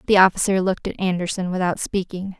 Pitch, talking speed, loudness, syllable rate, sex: 185 Hz, 175 wpm, -21 LUFS, 6.3 syllables/s, female